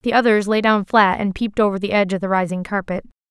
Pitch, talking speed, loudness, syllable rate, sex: 200 Hz, 255 wpm, -18 LUFS, 6.6 syllables/s, female